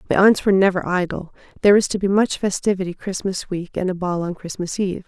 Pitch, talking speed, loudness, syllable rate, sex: 185 Hz, 225 wpm, -20 LUFS, 6.4 syllables/s, female